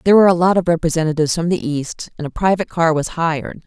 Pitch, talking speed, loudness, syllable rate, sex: 165 Hz, 245 wpm, -17 LUFS, 7.2 syllables/s, female